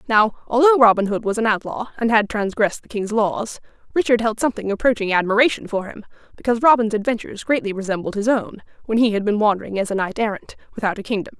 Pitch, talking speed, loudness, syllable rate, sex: 215 Hz, 205 wpm, -19 LUFS, 6.6 syllables/s, female